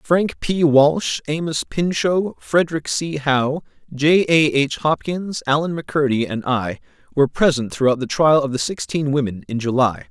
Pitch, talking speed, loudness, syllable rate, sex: 150 Hz, 160 wpm, -19 LUFS, 4.7 syllables/s, male